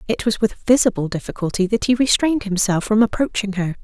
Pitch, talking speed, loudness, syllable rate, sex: 210 Hz, 190 wpm, -19 LUFS, 6.1 syllables/s, female